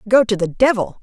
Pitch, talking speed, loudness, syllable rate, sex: 220 Hz, 235 wpm, -16 LUFS, 6.0 syllables/s, female